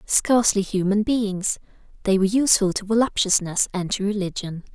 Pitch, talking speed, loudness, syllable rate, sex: 200 Hz, 140 wpm, -21 LUFS, 5.4 syllables/s, female